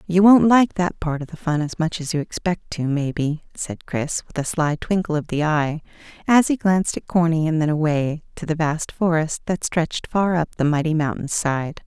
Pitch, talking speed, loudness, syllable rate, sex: 160 Hz, 220 wpm, -21 LUFS, 5.0 syllables/s, female